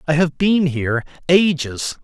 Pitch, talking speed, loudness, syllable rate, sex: 155 Hz, 120 wpm, -18 LUFS, 4.4 syllables/s, male